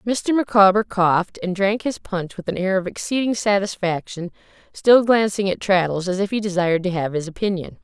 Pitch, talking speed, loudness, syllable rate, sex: 195 Hz, 185 wpm, -20 LUFS, 5.4 syllables/s, female